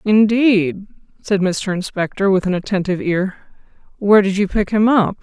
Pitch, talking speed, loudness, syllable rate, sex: 200 Hz, 160 wpm, -17 LUFS, 5.1 syllables/s, female